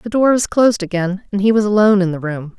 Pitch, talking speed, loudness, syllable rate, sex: 200 Hz, 280 wpm, -15 LUFS, 6.5 syllables/s, female